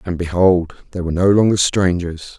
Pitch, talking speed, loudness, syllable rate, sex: 90 Hz, 175 wpm, -16 LUFS, 5.1 syllables/s, male